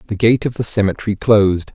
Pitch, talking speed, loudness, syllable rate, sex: 105 Hz, 205 wpm, -16 LUFS, 6.5 syllables/s, male